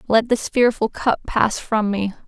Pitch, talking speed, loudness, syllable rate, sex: 220 Hz, 185 wpm, -20 LUFS, 4.2 syllables/s, female